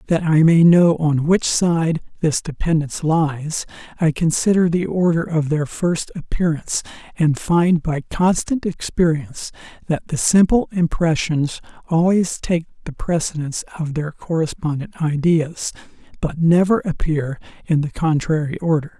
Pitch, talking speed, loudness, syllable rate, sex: 160 Hz, 135 wpm, -19 LUFS, 4.4 syllables/s, male